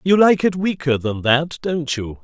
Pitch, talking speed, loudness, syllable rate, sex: 155 Hz, 215 wpm, -18 LUFS, 4.3 syllables/s, male